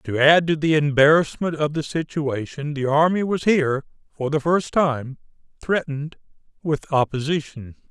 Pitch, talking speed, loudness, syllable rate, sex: 150 Hz, 145 wpm, -21 LUFS, 4.8 syllables/s, male